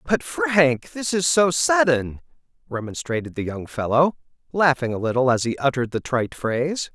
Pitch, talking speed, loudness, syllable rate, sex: 140 Hz, 155 wpm, -21 LUFS, 5.0 syllables/s, male